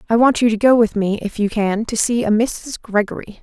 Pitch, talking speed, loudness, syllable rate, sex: 220 Hz, 265 wpm, -17 LUFS, 5.4 syllables/s, female